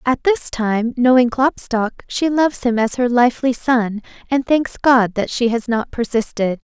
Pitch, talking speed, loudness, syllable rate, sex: 245 Hz, 180 wpm, -17 LUFS, 4.4 syllables/s, female